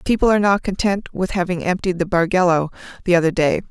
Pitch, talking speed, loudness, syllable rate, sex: 180 Hz, 210 wpm, -18 LUFS, 6.7 syllables/s, female